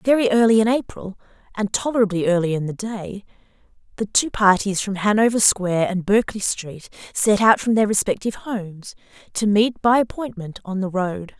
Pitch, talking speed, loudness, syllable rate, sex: 205 Hz, 170 wpm, -20 LUFS, 5.3 syllables/s, female